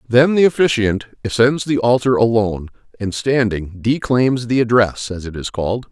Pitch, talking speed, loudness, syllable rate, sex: 115 Hz, 160 wpm, -17 LUFS, 4.9 syllables/s, male